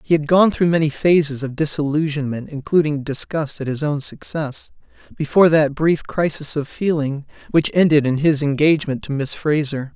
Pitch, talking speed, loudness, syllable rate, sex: 150 Hz, 170 wpm, -19 LUFS, 4.4 syllables/s, male